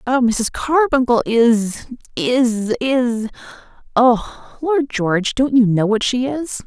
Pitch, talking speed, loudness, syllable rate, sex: 240 Hz, 110 wpm, -17 LUFS, 3.6 syllables/s, female